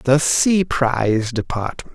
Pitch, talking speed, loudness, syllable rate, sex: 130 Hz, 125 wpm, -18 LUFS, 3.6 syllables/s, male